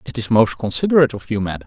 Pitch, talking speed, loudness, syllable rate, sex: 115 Hz, 255 wpm, -18 LUFS, 7.6 syllables/s, male